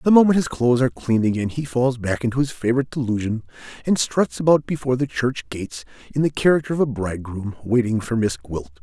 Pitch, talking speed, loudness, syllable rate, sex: 125 Hz, 210 wpm, -21 LUFS, 6.5 syllables/s, male